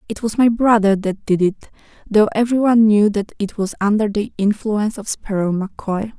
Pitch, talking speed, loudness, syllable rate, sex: 210 Hz, 185 wpm, -17 LUFS, 5.5 syllables/s, female